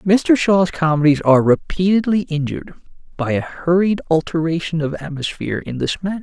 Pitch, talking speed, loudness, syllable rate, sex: 165 Hz, 145 wpm, -18 LUFS, 5.5 syllables/s, male